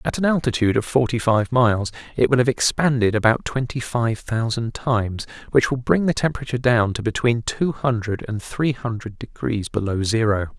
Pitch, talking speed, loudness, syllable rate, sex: 120 Hz, 180 wpm, -21 LUFS, 5.4 syllables/s, male